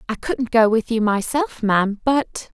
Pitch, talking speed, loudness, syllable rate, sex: 230 Hz, 160 wpm, -19 LUFS, 3.9 syllables/s, female